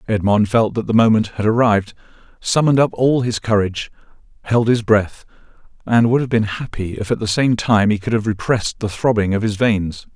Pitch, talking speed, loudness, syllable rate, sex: 110 Hz, 200 wpm, -17 LUFS, 5.5 syllables/s, male